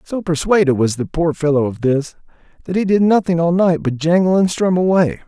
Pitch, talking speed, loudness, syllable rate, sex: 165 Hz, 215 wpm, -16 LUFS, 5.4 syllables/s, male